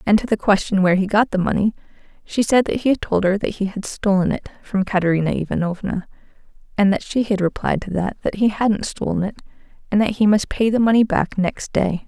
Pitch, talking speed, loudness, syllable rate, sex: 205 Hz, 230 wpm, -19 LUFS, 5.8 syllables/s, female